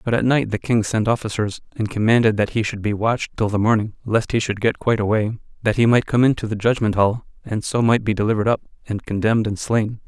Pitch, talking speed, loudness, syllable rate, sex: 110 Hz, 245 wpm, -20 LUFS, 6.2 syllables/s, male